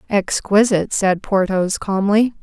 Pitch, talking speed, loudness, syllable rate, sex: 200 Hz, 100 wpm, -17 LUFS, 4.2 syllables/s, female